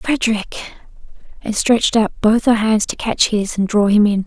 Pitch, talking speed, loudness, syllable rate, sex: 215 Hz, 195 wpm, -16 LUFS, 4.7 syllables/s, female